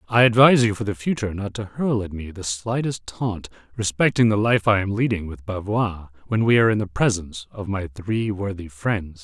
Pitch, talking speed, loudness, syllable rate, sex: 100 Hz, 215 wpm, -22 LUFS, 5.4 syllables/s, male